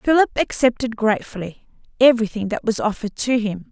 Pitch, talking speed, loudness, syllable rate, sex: 230 Hz, 145 wpm, -19 LUFS, 6.1 syllables/s, female